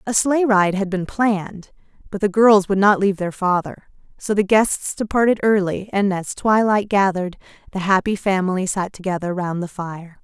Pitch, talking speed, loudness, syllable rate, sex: 195 Hz, 180 wpm, -19 LUFS, 5.0 syllables/s, female